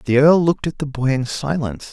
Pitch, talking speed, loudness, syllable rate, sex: 140 Hz, 250 wpm, -18 LUFS, 6.3 syllables/s, male